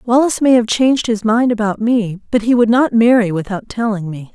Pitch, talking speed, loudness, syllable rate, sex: 225 Hz, 220 wpm, -14 LUFS, 5.5 syllables/s, female